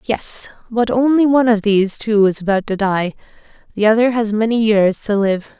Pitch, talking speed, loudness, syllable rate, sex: 215 Hz, 195 wpm, -16 LUFS, 5.1 syllables/s, female